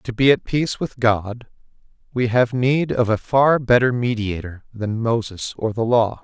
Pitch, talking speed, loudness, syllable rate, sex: 120 Hz, 185 wpm, -20 LUFS, 4.4 syllables/s, male